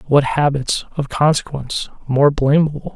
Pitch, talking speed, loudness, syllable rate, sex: 140 Hz, 120 wpm, -17 LUFS, 4.8 syllables/s, male